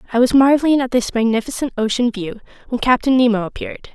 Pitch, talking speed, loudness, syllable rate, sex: 240 Hz, 185 wpm, -17 LUFS, 6.6 syllables/s, female